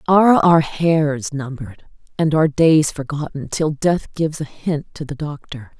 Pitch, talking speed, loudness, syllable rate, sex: 150 Hz, 155 wpm, -18 LUFS, 4.4 syllables/s, female